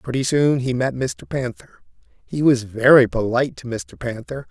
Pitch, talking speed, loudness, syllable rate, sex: 120 Hz, 175 wpm, -20 LUFS, 4.6 syllables/s, male